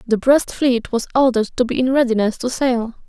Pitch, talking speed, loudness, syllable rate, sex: 245 Hz, 215 wpm, -18 LUFS, 5.8 syllables/s, female